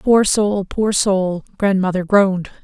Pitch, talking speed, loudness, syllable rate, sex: 195 Hz, 135 wpm, -17 LUFS, 3.8 syllables/s, female